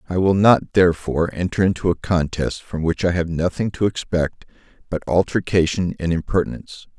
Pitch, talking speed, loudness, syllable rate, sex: 90 Hz, 165 wpm, -20 LUFS, 5.6 syllables/s, male